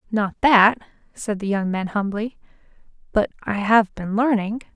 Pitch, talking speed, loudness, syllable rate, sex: 210 Hz, 150 wpm, -21 LUFS, 4.4 syllables/s, female